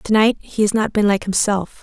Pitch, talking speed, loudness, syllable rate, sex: 205 Hz, 265 wpm, -18 LUFS, 5.1 syllables/s, female